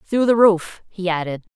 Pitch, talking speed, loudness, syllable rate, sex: 190 Hz, 195 wpm, -18 LUFS, 4.6 syllables/s, female